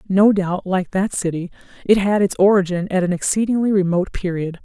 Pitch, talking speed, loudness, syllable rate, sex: 190 Hz, 180 wpm, -18 LUFS, 5.6 syllables/s, female